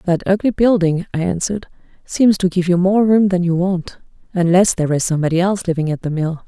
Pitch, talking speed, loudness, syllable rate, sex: 180 Hz, 205 wpm, -16 LUFS, 6.1 syllables/s, female